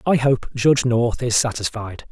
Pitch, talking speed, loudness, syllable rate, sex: 120 Hz, 170 wpm, -19 LUFS, 4.6 syllables/s, male